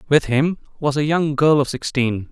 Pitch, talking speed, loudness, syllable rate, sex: 140 Hz, 210 wpm, -19 LUFS, 4.7 syllables/s, male